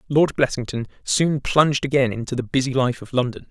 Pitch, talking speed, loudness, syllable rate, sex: 130 Hz, 190 wpm, -21 LUFS, 5.7 syllables/s, male